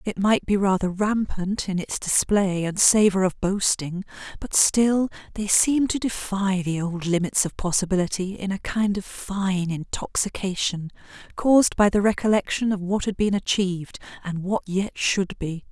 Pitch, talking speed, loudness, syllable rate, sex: 195 Hz, 165 wpm, -23 LUFS, 4.6 syllables/s, female